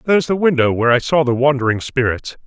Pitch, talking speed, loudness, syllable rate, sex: 135 Hz, 220 wpm, -16 LUFS, 6.6 syllables/s, male